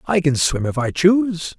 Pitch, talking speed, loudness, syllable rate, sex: 160 Hz, 230 wpm, -18 LUFS, 4.9 syllables/s, male